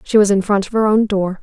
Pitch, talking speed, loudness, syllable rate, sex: 205 Hz, 340 wpm, -15 LUFS, 6.0 syllables/s, female